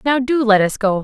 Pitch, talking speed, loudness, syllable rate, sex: 230 Hz, 290 wpm, -15 LUFS, 5.4 syllables/s, female